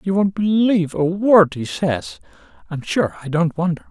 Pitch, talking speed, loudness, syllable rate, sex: 160 Hz, 170 wpm, -18 LUFS, 4.7 syllables/s, male